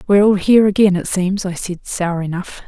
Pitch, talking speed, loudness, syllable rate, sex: 190 Hz, 225 wpm, -16 LUFS, 5.7 syllables/s, female